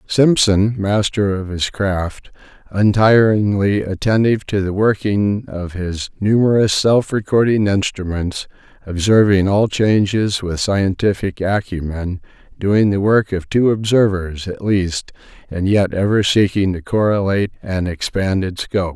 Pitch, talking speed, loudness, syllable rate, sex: 100 Hz, 125 wpm, -17 LUFS, 4.2 syllables/s, male